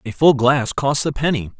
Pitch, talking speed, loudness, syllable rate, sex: 135 Hz, 225 wpm, -17 LUFS, 4.9 syllables/s, male